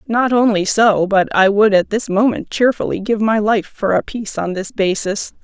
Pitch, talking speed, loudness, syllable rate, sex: 210 Hz, 210 wpm, -16 LUFS, 4.8 syllables/s, female